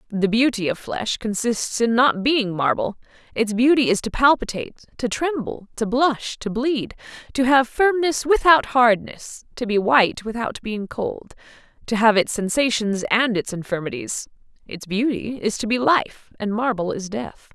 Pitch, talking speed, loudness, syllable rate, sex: 230 Hz, 165 wpm, -21 LUFS, 4.5 syllables/s, female